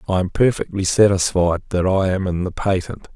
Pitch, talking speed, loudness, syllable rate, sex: 95 Hz, 190 wpm, -19 LUFS, 5.2 syllables/s, male